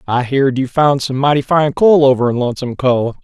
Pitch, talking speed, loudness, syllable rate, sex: 135 Hz, 225 wpm, -14 LUFS, 5.6 syllables/s, male